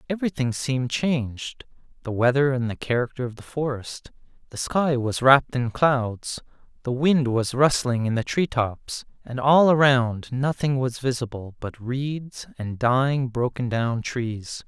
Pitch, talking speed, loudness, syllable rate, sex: 130 Hz, 150 wpm, -23 LUFS, 4.3 syllables/s, male